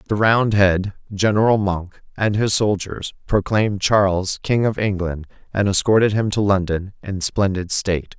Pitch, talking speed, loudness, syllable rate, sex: 100 Hz, 145 wpm, -19 LUFS, 4.6 syllables/s, male